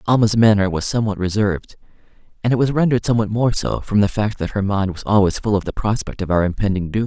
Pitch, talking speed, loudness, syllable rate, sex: 105 Hz, 240 wpm, -19 LUFS, 6.6 syllables/s, male